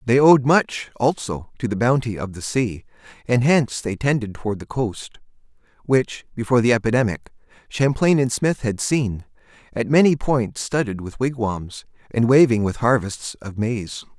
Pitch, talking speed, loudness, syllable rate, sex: 120 Hz, 160 wpm, -20 LUFS, 4.8 syllables/s, male